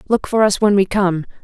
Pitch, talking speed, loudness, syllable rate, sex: 200 Hz, 250 wpm, -16 LUFS, 5.4 syllables/s, female